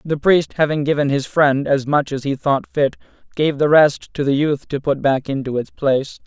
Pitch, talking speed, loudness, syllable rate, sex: 145 Hz, 230 wpm, -18 LUFS, 4.9 syllables/s, male